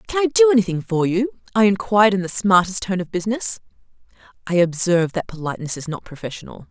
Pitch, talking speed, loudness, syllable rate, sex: 195 Hz, 190 wpm, -19 LUFS, 4.4 syllables/s, female